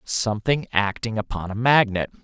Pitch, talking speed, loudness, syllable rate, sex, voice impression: 110 Hz, 135 wpm, -22 LUFS, 5.1 syllables/s, male, masculine, adult-like, slightly middle-aged, thick, tensed, slightly powerful, very bright, soft, muffled, very fluent, very cool, very intellectual, slightly refreshing, very sincere, calm, mature, very friendly, very reassuring, very unique, very elegant, slightly wild, very sweet, very lively, very kind, slightly modest